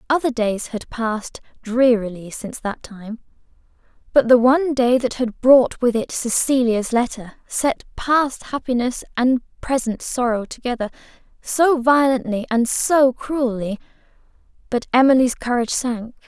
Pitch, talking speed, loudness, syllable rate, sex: 245 Hz, 130 wpm, -19 LUFS, 4.4 syllables/s, female